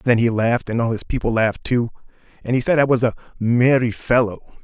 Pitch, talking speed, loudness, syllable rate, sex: 120 Hz, 220 wpm, -19 LUFS, 5.9 syllables/s, male